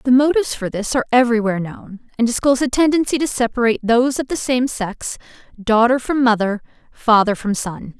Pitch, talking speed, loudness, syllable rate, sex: 240 Hz, 180 wpm, -17 LUFS, 6.0 syllables/s, female